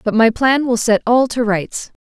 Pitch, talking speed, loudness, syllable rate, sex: 235 Hz, 235 wpm, -15 LUFS, 4.4 syllables/s, female